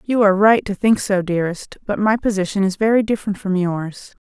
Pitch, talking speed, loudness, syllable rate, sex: 200 Hz, 215 wpm, -18 LUFS, 5.8 syllables/s, female